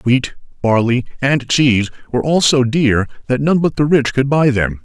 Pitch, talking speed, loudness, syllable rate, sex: 130 Hz, 200 wpm, -15 LUFS, 4.9 syllables/s, male